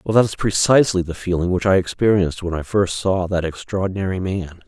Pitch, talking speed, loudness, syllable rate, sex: 95 Hz, 205 wpm, -19 LUFS, 5.9 syllables/s, male